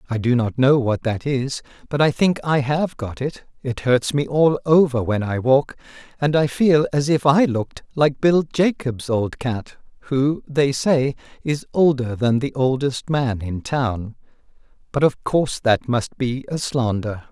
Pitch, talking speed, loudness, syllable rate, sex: 135 Hz, 185 wpm, -20 LUFS, 4.1 syllables/s, male